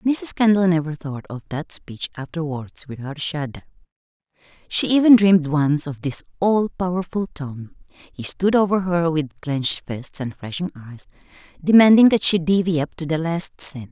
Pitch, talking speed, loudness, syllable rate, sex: 165 Hz, 165 wpm, -20 LUFS, 4.8 syllables/s, female